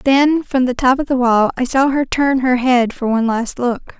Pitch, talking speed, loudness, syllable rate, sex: 255 Hz, 255 wpm, -15 LUFS, 4.8 syllables/s, female